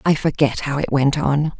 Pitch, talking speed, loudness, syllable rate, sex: 145 Hz, 225 wpm, -19 LUFS, 4.7 syllables/s, female